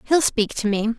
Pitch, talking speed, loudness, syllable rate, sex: 235 Hz, 245 wpm, -21 LUFS, 4.8 syllables/s, female